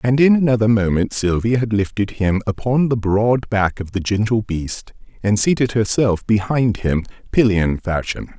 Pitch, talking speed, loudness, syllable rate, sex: 110 Hz, 165 wpm, -18 LUFS, 4.6 syllables/s, male